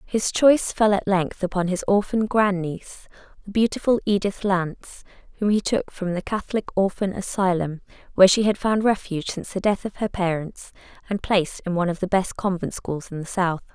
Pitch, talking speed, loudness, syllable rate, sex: 190 Hz, 190 wpm, -22 LUFS, 5.6 syllables/s, female